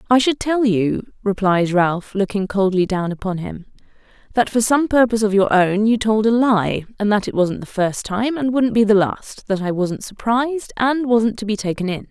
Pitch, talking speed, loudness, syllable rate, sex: 215 Hz, 220 wpm, -18 LUFS, 4.8 syllables/s, female